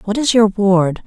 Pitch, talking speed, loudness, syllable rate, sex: 205 Hz, 225 wpm, -14 LUFS, 4.3 syllables/s, female